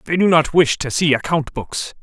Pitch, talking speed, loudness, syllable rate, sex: 155 Hz, 235 wpm, -17 LUFS, 4.9 syllables/s, male